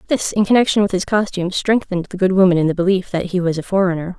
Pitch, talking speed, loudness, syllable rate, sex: 185 Hz, 260 wpm, -17 LUFS, 7.0 syllables/s, female